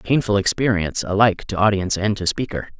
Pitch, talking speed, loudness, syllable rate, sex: 100 Hz, 170 wpm, -19 LUFS, 6.6 syllables/s, male